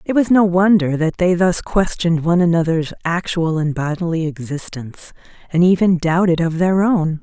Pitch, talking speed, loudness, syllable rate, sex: 170 Hz, 165 wpm, -17 LUFS, 5.1 syllables/s, female